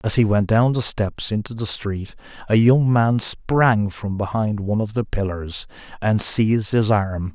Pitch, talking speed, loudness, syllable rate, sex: 105 Hz, 190 wpm, -20 LUFS, 4.3 syllables/s, male